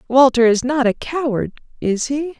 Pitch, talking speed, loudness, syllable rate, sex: 260 Hz, 175 wpm, -17 LUFS, 4.7 syllables/s, female